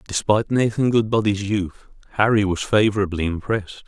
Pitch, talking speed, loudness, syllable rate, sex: 105 Hz, 125 wpm, -20 LUFS, 5.6 syllables/s, male